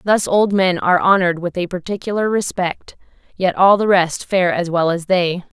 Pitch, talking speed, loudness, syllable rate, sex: 185 Hz, 195 wpm, -17 LUFS, 5.0 syllables/s, female